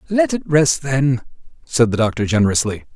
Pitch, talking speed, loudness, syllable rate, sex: 125 Hz, 160 wpm, -17 LUFS, 5.3 syllables/s, male